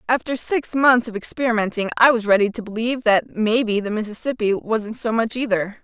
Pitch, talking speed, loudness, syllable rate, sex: 225 Hz, 185 wpm, -20 LUFS, 5.6 syllables/s, female